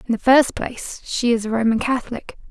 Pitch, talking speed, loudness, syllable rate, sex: 240 Hz, 215 wpm, -19 LUFS, 5.9 syllables/s, female